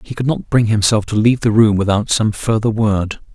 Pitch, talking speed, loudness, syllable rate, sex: 110 Hz, 235 wpm, -15 LUFS, 5.5 syllables/s, male